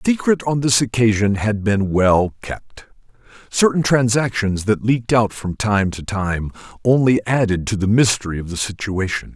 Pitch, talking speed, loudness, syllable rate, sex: 110 Hz, 165 wpm, -18 LUFS, 4.8 syllables/s, male